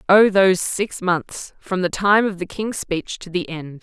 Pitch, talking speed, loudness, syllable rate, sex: 185 Hz, 220 wpm, -20 LUFS, 4.1 syllables/s, female